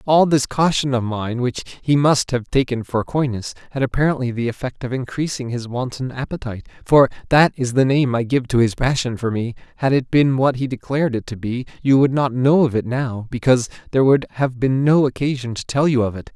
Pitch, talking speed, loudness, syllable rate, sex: 130 Hz, 220 wpm, -19 LUFS, 5.6 syllables/s, male